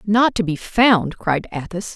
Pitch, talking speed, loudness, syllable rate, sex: 195 Hz, 185 wpm, -19 LUFS, 3.9 syllables/s, female